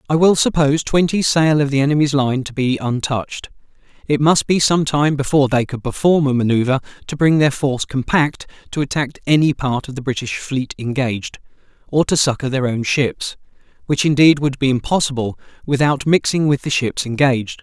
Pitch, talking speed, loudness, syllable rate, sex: 140 Hz, 185 wpm, -17 LUFS, 5.5 syllables/s, male